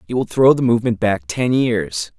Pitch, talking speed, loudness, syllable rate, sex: 110 Hz, 220 wpm, -17 LUFS, 5.1 syllables/s, male